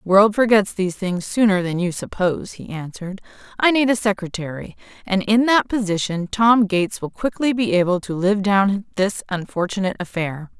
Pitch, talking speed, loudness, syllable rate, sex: 195 Hz, 175 wpm, -20 LUFS, 5.3 syllables/s, female